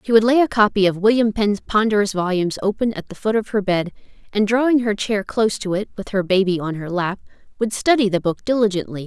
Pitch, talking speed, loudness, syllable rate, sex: 205 Hz, 230 wpm, -19 LUFS, 6.1 syllables/s, female